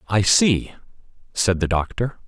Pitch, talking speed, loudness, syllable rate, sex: 105 Hz, 130 wpm, -20 LUFS, 4.1 syllables/s, male